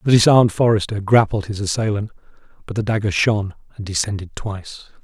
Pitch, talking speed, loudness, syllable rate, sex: 105 Hz, 155 wpm, -19 LUFS, 6.3 syllables/s, male